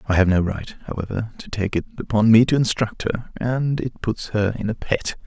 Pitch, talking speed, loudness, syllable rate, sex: 110 Hz, 230 wpm, -22 LUFS, 5.5 syllables/s, male